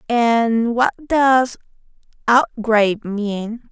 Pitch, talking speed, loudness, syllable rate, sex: 230 Hz, 80 wpm, -17 LUFS, 2.8 syllables/s, female